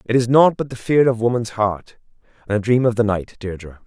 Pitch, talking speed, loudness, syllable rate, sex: 115 Hz, 250 wpm, -18 LUFS, 5.6 syllables/s, male